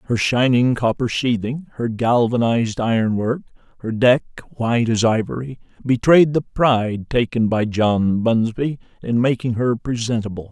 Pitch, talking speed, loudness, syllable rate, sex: 120 Hz, 135 wpm, -19 LUFS, 4.6 syllables/s, male